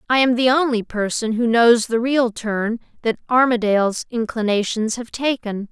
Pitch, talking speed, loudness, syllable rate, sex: 230 Hz, 160 wpm, -19 LUFS, 4.7 syllables/s, female